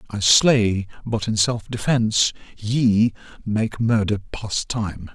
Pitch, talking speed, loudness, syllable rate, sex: 110 Hz, 105 wpm, -20 LUFS, 3.7 syllables/s, male